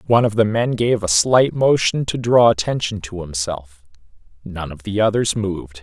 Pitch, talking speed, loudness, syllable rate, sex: 100 Hz, 185 wpm, -18 LUFS, 4.9 syllables/s, male